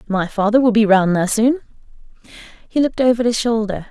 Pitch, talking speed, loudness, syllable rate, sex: 225 Hz, 185 wpm, -16 LUFS, 6.3 syllables/s, female